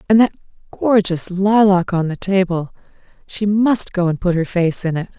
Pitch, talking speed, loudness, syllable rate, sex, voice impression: 190 Hz, 185 wpm, -17 LUFS, 4.7 syllables/s, female, feminine, adult-like, intellectual, slightly calm